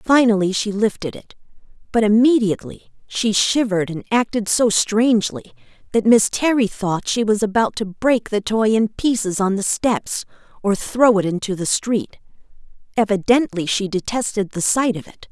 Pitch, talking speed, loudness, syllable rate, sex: 210 Hz, 160 wpm, -19 LUFS, 4.8 syllables/s, female